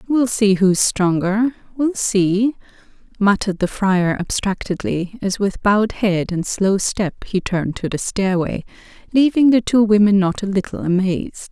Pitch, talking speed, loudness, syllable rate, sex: 205 Hz, 155 wpm, -18 LUFS, 4.5 syllables/s, female